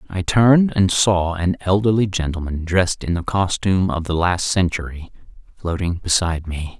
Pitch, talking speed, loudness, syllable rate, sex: 90 Hz, 160 wpm, -19 LUFS, 5.1 syllables/s, male